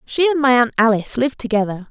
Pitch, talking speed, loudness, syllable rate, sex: 245 Hz, 220 wpm, -17 LUFS, 6.3 syllables/s, female